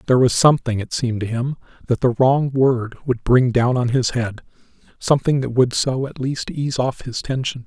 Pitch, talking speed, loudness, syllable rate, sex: 125 Hz, 210 wpm, -19 LUFS, 5.2 syllables/s, male